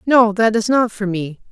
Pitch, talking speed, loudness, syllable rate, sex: 215 Hz, 235 wpm, -16 LUFS, 4.6 syllables/s, female